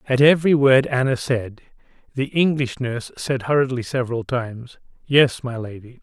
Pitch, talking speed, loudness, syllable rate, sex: 130 Hz, 150 wpm, -20 LUFS, 5.1 syllables/s, male